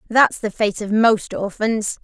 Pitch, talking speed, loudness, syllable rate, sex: 215 Hz, 175 wpm, -19 LUFS, 3.7 syllables/s, female